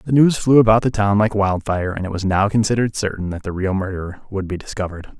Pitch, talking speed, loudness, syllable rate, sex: 100 Hz, 245 wpm, -19 LUFS, 6.7 syllables/s, male